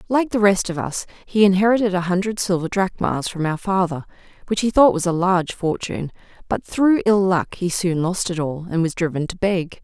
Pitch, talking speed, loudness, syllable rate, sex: 185 Hz, 215 wpm, -20 LUFS, 5.3 syllables/s, female